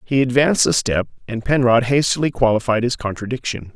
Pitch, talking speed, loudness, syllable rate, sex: 125 Hz, 160 wpm, -18 LUFS, 5.8 syllables/s, male